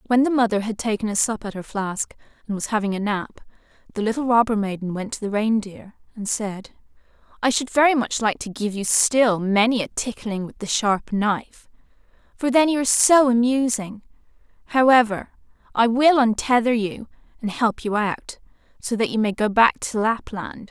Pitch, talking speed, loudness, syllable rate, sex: 225 Hz, 185 wpm, -21 LUFS, 5.0 syllables/s, female